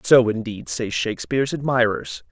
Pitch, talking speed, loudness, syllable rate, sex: 115 Hz, 130 wpm, -21 LUFS, 5.1 syllables/s, male